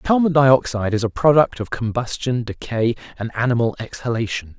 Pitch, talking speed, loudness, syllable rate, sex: 120 Hz, 145 wpm, -19 LUFS, 5.4 syllables/s, male